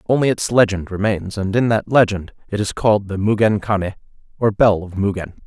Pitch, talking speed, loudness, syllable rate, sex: 105 Hz, 200 wpm, -18 LUFS, 5.4 syllables/s, male